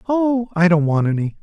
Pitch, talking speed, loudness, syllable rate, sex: 190 Hz, 210 wpm, -17 LUFS, 5.0 syllables/s, male